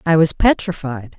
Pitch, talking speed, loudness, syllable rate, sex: 160 Hz, 150 wpm, -17 LUFS, 4.7 syllables/s, female